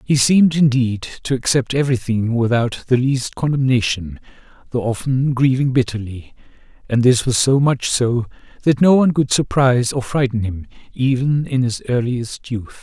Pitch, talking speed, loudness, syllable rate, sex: 125 Hz, 155 wpm, -17 LUFS, 4.8 syllables/s, male